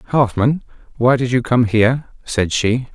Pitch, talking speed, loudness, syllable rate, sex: 120 Hz, 165 wpm, -17 LUFS, 4.5 syllables/s, male